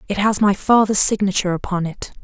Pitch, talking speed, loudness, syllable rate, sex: 195 Hz, 190 wpm, -17 LUFS, 6.0 syllables/s, female